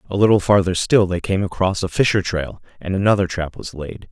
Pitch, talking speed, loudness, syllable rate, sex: 95 Hz, 220 wpm, -19 LUFS, 5.6 syllables/s, male